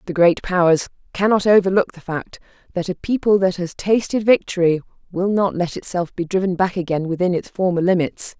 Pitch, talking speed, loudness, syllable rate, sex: 185 Hz, 185 wpm, -19 LUFS, 5.5 syllables/s, female